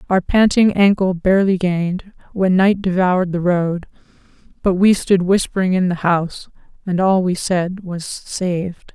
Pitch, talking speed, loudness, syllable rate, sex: 185 Hz, 155 wpm, -17 LUFS, 4.5 syllables/s, female